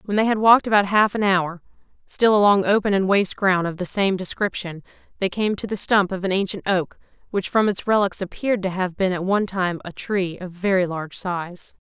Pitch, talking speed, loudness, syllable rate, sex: 190 Hz, 220 wpm, -21 LUFS, 5.6 syllables/s, female